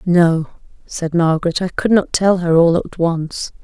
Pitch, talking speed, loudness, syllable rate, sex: 170 Hz, 180 wpm, -16 LUFS, 4.2 syllables/s, female